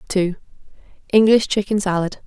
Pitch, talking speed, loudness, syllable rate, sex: 195 Hz, 80 wpm, -18 LUFS, 5.3 syllables/s, female